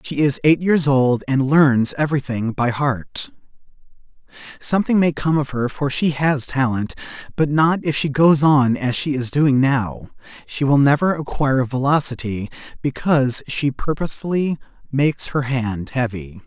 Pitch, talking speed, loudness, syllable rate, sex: 140 Hz, 155 wpm, -19 LUFS, 4.5 syllables/s, male